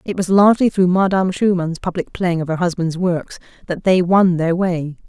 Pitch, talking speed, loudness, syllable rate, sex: 180 Hz, 200 wpm, -17 LUFS, 5.2 syllables/s, female